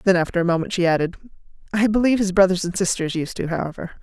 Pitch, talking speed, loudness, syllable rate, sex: 185 Hz, 225 wpm, -21 LUFS, 7.4 syllables/s, female